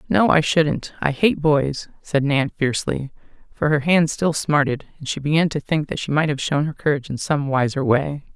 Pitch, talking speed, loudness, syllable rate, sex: 150 Hz, 215 wpm, -20 LUFS, 5.0 syllables/s, female